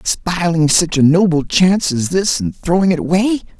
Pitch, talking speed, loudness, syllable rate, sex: 170 Hz, 185 wpm, -14 LUFS, 4.7 syllables/s, male